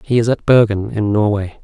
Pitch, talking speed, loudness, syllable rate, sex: 110 Hz, 220 wpm, -15 LUFS, 5.5 syllables/s, male